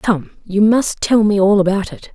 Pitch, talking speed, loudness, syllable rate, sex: 200 Hz, 225 wpm, -15 LUFS, 4.6 syllables/s, female